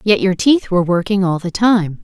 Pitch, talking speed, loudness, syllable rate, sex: 190 Hz, 235 wpm, -15 LUFS, 5.2 syllables/s, female